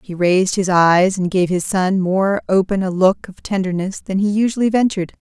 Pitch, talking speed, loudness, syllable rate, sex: 190 Hz, 205 wpm, -17 LUFS, 5.2 syllables/s, female